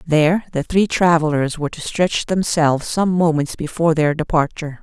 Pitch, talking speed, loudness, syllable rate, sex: 160 Hz, 160 wpm, -18 LUFS, 5.4 syllables/s, female